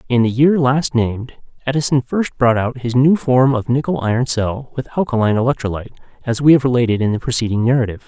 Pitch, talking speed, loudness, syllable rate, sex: 125 Hz, 200 wpm, -16 LUFS, 6.4 syllables/s, male